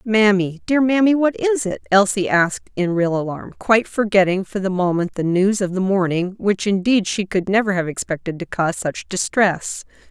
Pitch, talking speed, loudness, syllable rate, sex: 195 Hz, 190 wpm, -19 LUFS, 5.0 syllables/s, female